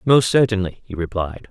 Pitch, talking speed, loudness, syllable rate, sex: 105 Hz, 160 wpm, -20 LUFS, 5.2 syllables/s, male